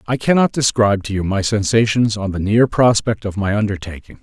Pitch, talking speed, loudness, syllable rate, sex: 105 Hz, 200 wpm, -17 LUFS, 5.7 syllables/s, male